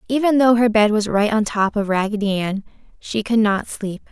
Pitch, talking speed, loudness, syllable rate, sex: 215 Hz, 220 wpm, -18 LUFS, 5.0 syllables/s, female